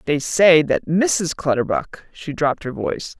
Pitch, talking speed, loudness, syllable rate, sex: 160 Hz, 170 wpm, -18 LUFS, 4.4 syllables/s, female